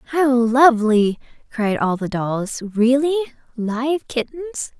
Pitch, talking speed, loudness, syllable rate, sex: 250 Hz, 115 wpm, -19 LUFS, 3.6 syllables/s, female